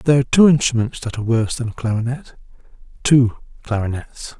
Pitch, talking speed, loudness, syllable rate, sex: 125 Hz, 150 wpm, -18 LUFS, 6.3 syllables/s, male